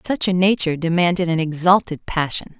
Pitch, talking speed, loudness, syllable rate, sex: 175 Hz, 160 wpm, -18 LUFS, 5.7 syllables/s, female